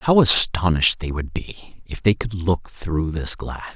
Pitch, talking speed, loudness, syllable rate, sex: 90 Hz, 190 wpm, -19 LUFS, 4.2 syllables/s, male